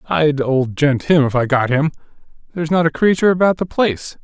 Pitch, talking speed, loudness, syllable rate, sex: 150 Hz, 200 wpm, -16 LUFS, 5.8 syllables/s, male